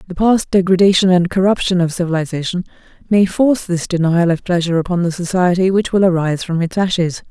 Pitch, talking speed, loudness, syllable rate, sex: 180 Hz, 180 wpm, -15 LUFS, 6.2 syllables/s, female